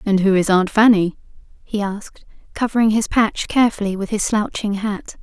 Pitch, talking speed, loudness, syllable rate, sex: 210 Hz, 170 wpm, -18 LUFS, 5.2 syllables/s, female